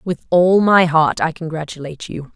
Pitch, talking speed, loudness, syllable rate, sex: 165 Hz, 180 wpm, -15 LUFS, 5.0 syllables/s, female